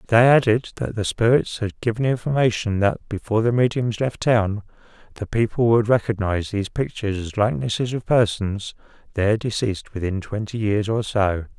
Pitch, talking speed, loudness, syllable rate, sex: 110 Hz, 160 wpm, -21 LUFS, 5.5 syllables/s, male